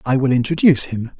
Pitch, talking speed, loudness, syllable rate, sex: 135 Hz, 200 wpm, -17 LUFS, 6.7 syllables/s, male